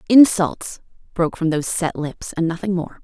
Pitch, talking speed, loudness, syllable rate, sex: 180 Hz, 180 wpm, -19 LUFS, 5.2 syllables/s, female